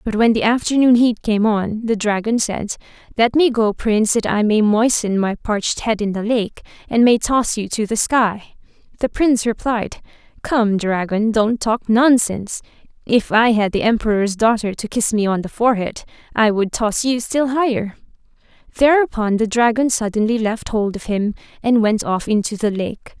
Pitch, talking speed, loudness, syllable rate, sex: 220 Hz, 185 wpm, -17 LUFS, 4.8 syllables/s, female